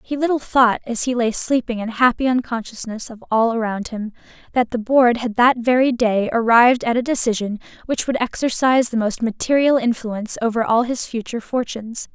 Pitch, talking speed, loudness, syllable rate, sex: 235 Hz, 185 wpm, -19 LUFS, 5.5 syllables/s, female